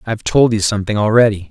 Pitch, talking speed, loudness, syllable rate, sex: 105 Hz, 200 wpm, -14 LUFS, 7.2 syllables/s, male